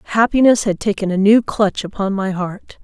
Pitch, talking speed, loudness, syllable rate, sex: 205 Hz, 190 wpm, -16 LUFS, 4.9 syllables/s, female